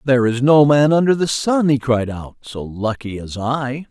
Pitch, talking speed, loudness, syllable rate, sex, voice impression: 130 Hz, 215 wpm, -17 LUFS, 4.5 syllables/s, male, masculine, adult-like, thick, tensed, powerful, raspy, cool, mature, wild, lively, slightly intense